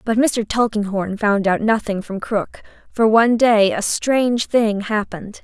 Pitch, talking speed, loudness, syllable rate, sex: 215 Hz, 165 wpm, -18 LUFS, 4.3 syllables/s, female